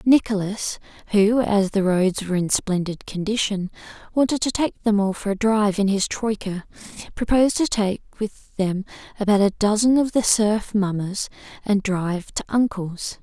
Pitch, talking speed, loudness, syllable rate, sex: 205 Hz, 165 wpm, -22 LUFS, 4.8 syllables/s, female